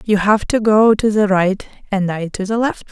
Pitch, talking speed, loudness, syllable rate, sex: 205 Hz, 245 wpm, -16 LUFS, 4.7 syllables/s, female